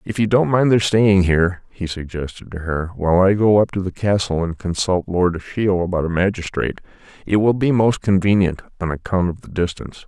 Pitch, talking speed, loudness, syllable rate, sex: 95 Hz, 210 wpm, -19 LUFS, 5.5 syllables/s, male